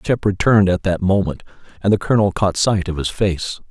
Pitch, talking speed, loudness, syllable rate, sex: 95 Hz, 210 wpm, -18 LUFS, 5.7 syllables/s, male